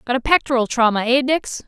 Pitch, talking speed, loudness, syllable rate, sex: 250 Hz, 215 wpm, -18 LUFS, 5.9 syllables/s, female